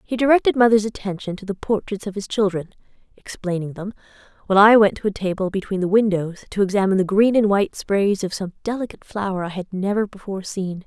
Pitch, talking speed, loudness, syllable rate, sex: 200 Hz, 205 wpm, -20 LUFS, 6.4 syllables/s, female